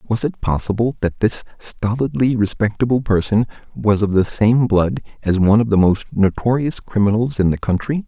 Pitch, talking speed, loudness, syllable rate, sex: 110 Hz, 170 wpm, -18 LUFS, 5.1 syllables/s, male